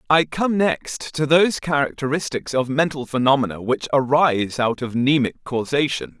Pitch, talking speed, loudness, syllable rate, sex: 140 Hz, 145 wpm, -20 LUFS, 5.0 syllables/s, male